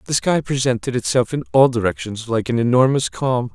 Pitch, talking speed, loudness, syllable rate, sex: 125 Hz, 185 wpm, -18 LUFS, 5.4 syllables/s, male